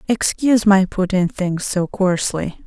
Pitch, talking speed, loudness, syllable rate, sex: 190 Hz, 135 wpm, -18 LUFS, 4.4 syllables/s, female